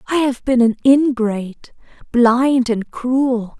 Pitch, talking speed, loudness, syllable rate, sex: 245 Hz, 135 wpm, -16 LUFS, 3.5 syllables/s, female